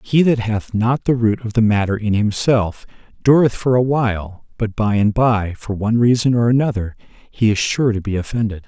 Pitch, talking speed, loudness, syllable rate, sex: 115 Hz, 205 wpm, -17 LUFS, 5.0 syllables/s, male